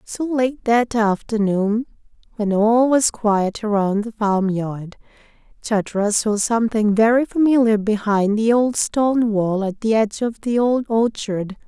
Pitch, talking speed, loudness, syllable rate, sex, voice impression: 220 Hz, 145 wpm, -19 LUFS, 4.1 syllables/s, female, very feminine, very middle-aged, very thin, slightly relaxed, weak, slightly bright, very soft, clear, fluent, slightly raspy, cute, intellectual, refreshing, very sincere, very calm, very friendly, very reassuring, very unique, very elegant, very sweet, lively, very kind, very modest, very light